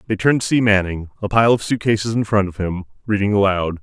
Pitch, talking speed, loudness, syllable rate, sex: 105 Hz, 235 wpm, -18 LUFS, 6.4 syllables/s, male